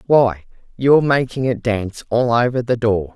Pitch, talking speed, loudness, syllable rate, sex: 115 Hz, 170 wpm, -17 LUFS, 5.0 syllables/s, female